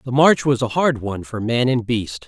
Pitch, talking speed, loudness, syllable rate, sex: 125 Hz, 265 wpm, -19 LUFS, 5.1 syllables/s, male